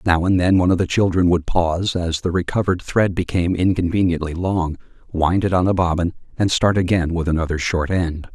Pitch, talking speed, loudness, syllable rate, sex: 90 Hz, 200 wpm, -19 LUFS, 5.7 syllables/s, male